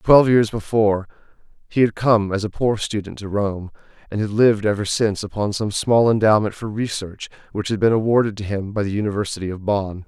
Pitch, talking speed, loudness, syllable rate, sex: 105 Hz, 200 wpm, -20 LUFS, 5.8 syllables/s, male